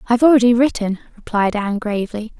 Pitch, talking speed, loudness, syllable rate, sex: 225 Hz, 175 wpm, -17 LUFS, 6.8 syllables/s, female